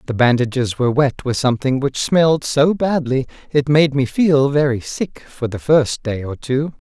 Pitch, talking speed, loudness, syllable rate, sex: 135 Hz, 190 wpm, -17 LUFS, 4.7 syllables/s, male